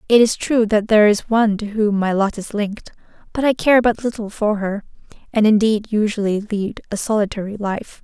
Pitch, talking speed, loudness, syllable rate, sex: 215 Hz, 200 wpm, -18 LUFS, 5.4 syllables/s, female